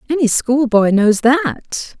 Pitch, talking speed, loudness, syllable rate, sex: 255 Hz, 120 wpm, -14 LUFS, 3.4 syllables/s, female